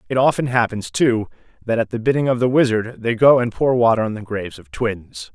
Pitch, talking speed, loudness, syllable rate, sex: 115 Hz, 235 wpm, -18 LUFS, 5.6 syllables/s, male